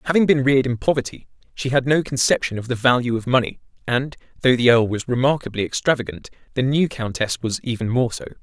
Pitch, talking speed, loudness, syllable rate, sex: 125 Hz, 200 wpm, -20 LUFS, 6.2 syllables/s, male